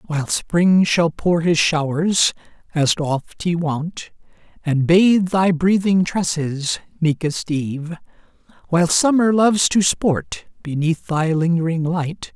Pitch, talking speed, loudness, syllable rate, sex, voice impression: 170 Hz, 125 wpm, -18 LUFS, 3.8 syllables/s, male, masculine, very middle-aged, slightly thick, unique, slightly kind